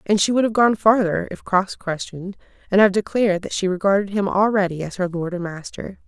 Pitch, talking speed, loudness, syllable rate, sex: 195 Hz, 215 wpm, -20 LUFS, 5.8 syllables/s, female